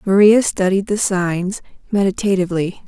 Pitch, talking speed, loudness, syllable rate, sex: 195 Hz, 105 wpm, -17 LUFS, 4.9 syllables/s, female